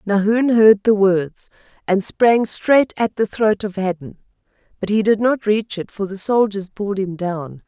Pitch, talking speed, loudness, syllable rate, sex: 205 Hz, 190 wpm, -18 LUFS, 4.3 syllables/s, female